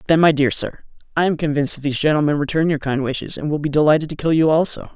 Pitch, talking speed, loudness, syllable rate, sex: 150 Hz, 265 wpm, -18 LUFS, 7.2 syllables/s, male